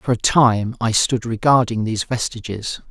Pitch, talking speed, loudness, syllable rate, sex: 115 Hz, 165 wpm, -18 LUFS, 4.7 syllables/s, male